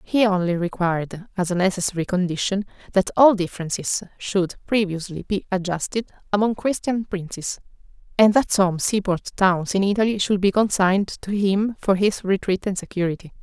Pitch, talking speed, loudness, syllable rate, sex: 190 Hz, 150 wpm, -22 LUFS, 5.2 syllables/s, female